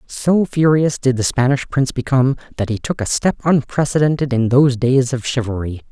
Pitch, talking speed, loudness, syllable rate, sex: 130 Hz, 185 wpm, -17 LUFS, 5.5 syllables/s, male